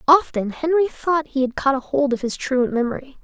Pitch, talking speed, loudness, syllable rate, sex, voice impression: 275 Hz, 205 wpm, -21 LUFS, 4.9 syllables/s, female, feminine, slightly young, cute, refreshing, friendly, slightly lively